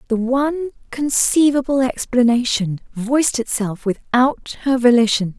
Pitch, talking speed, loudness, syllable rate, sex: 250 Hz, 100 wpm, -18 LUFS, 4.4 syllables/s, female